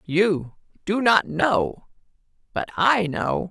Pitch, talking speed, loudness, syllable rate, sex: 175 Hz, 120 wpm, -22 LUFS, 2.9 syllables/s, male